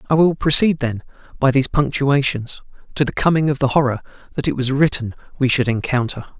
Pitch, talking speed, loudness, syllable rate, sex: 135 Hz, 190 wpm, -18 LUFS, 6.0 syllables/s, male